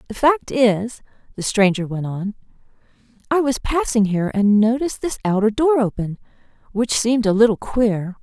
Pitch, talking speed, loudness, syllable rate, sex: 225 Hz, 160 wpm, -19 LUFS, 5.1 syllables/s, female